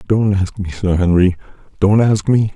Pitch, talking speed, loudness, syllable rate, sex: 100 Hz, 165 wpm, -15 LUFS, 5.0 syllables/s, male